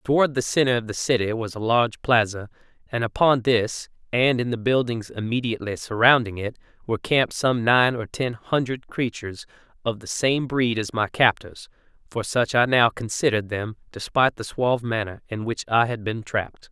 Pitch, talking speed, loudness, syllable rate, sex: 115 Hz, 185 wpm, -23 LUFS, 5.3 syllables/s, male